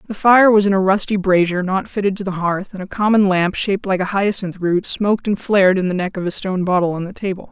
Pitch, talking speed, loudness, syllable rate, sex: 190 Hz, 270 wpm, -17 LUFS, 6.2 syllables/s, female